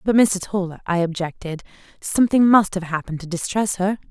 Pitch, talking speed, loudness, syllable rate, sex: 190 Hz, 175 wpm, -20 LUFS, 5.8 syllables/s, female